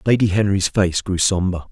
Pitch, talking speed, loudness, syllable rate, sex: 95 Hz, 175 wpm, -18 LUFS, 5.1 syllables/s, male